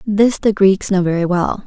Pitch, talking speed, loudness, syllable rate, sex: 195 Hz, 215 wpm, -15 LUFS, 4.5 syllables/s, female